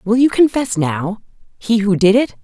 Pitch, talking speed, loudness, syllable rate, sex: 215 Hz, 170 wpm, -15 LUFS, 4.7 syllables/s, female